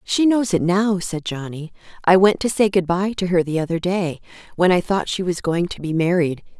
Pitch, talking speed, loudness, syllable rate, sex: 180 Hz, 225 wpm, -19 LUFS, 5.1 syllables/s, female